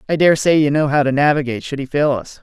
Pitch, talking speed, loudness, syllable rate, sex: 145 Hz, 295 wpm, -16 LUFS, 6.7 syllables/s, male